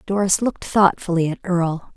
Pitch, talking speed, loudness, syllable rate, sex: 185 Hz, 155 wpm, -19 LUFS, 5.9 syllables/s, female